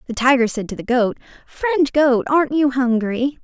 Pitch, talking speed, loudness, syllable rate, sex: 260 Hz, 190 wpm, -18 LUFS, 4.7 syllables/s, female